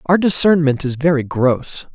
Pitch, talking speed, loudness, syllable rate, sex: 150 Hz, 155 wpm, -16 LUFS, 4.5 syllables/s, male